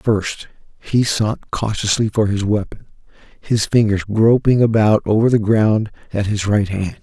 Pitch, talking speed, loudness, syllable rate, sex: 105 Hz, 155 wpm, -17 LUFS, 4.3 syllables/s, male